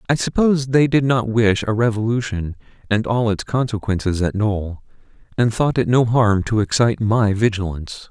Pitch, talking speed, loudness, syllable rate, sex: 110 Hz, 170 wpm, -18 LUFS, 5.1 syllables/s, male